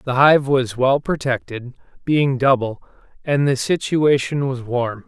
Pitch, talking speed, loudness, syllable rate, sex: 135 Hz, 140 wpm, -18 LUFS, 4.0 syllables/s, male